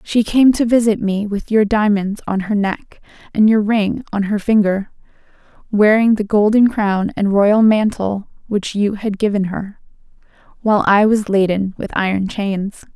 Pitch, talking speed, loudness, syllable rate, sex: 205 Hz, 165 wpm, -16 LUFS, 4.4 syllables/s, female